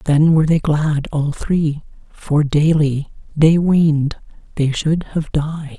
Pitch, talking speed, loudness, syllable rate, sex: 150 Hz, 145 wpm, -17 LUFS, 3.6 syllables/s, female